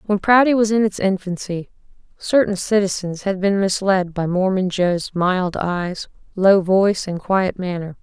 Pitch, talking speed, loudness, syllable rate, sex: 190 Hz, 155 wpm, -19 LUFS, 4.4 syllables/s, female